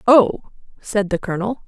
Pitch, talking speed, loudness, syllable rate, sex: 210 Hz, 145 wpm, -19 LUFS, 5.4 syllables/s, female